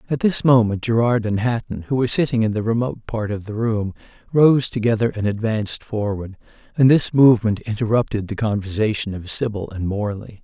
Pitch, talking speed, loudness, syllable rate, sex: 110 Hz, 180 wpm, -20 LUFS, 5.6 syllables/s, male